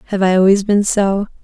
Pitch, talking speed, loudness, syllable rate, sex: 195 Hz, 210 wpm, -14 LUFS, 5.7 syllables/s, female